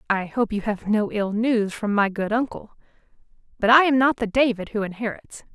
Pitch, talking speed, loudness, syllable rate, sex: 220 Hz, 205 wpm, -22 LUFS, 5.1 syllables/s, female